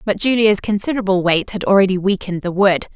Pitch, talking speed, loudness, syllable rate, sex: 195 Hz, 185 wpm, -16 LUFS, 6.5 syllables/s, female